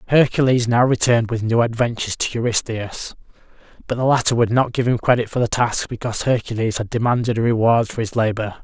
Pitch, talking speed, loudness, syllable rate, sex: 115 Hz, 195 wpm, -19 LUFS, 6.1 syllables/s, male